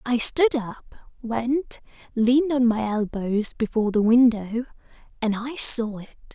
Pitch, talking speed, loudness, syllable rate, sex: 235 Hz, 140 wpm, -22 LUFS, 4.4 syllables/s, female